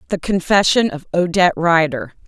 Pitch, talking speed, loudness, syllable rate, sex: 170 Hz, 130 wpm, -16 LUFS, 5.2 syllables/s, female